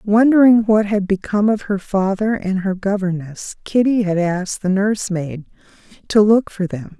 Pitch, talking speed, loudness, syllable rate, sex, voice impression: 200 Hz, 165 wpm, -17 LUFS, 4.9 syllables/s, female, feminine, middle-aged, soft, calm, elegant, kind